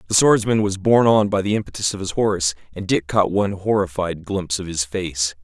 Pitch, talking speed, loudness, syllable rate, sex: 95 Hz, 220 wpm, -20 LUFS, 5.8 syllables/s, male